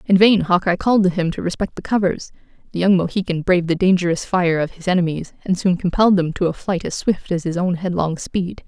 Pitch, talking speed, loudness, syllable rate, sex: 180 Hz, 235 wpm, -19 LUFS, 6.0 syllables/s, female